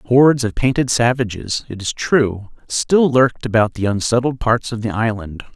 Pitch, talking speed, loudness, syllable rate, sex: 120 Hz, 175 wpm, -17 LUFS, 4.9 syllables/s, male